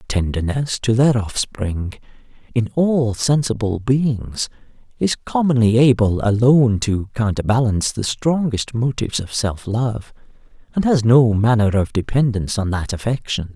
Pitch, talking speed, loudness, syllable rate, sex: 115 Hz, 135 wpm, -18 LUFS, 4.5 syllables/s, male